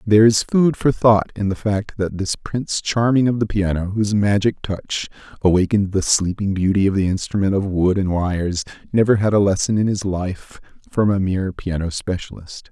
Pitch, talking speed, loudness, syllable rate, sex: 100 Hz, 195 wpm, -19 LUFS, 5.3 syllables/s, male